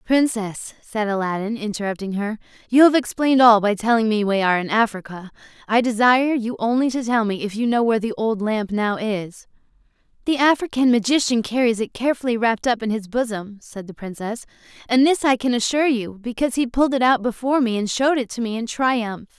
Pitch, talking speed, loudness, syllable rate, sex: 230 Hz, 205 wpm, -20 LUFS, 5.8 syllables/s, female